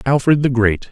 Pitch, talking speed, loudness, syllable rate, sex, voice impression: 125 Hz, 195 wpm, -15 LUFS, 5.1 syllables/s, male, very masculine, middle-aged, slightly thick, sincere, slightly mature, slightly wild